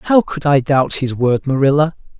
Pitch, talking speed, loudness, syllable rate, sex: 145 Hz, 190 wpm, -15 LUFS, 4.6 syllables/s, male